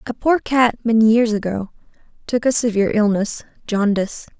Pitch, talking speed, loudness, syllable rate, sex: 220 Hz, 135 wpm, -18 LUFS, 5.4 syllables/s, female